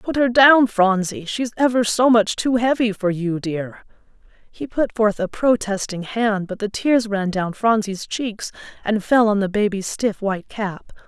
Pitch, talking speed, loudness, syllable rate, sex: 215 Hz, 185 wpm, -19 LUFS, 4.2 syllables/s, female